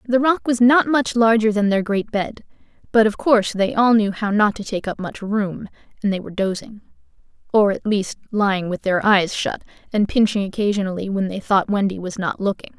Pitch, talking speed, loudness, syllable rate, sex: 210 Hz, 210 wpm, -19 LUFS, 5.3 syllables/s, female